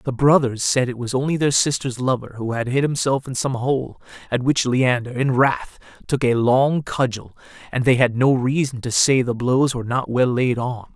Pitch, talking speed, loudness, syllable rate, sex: 125 Hz, 215 wpm, -20 LUFS, 4.9 syllables/s, male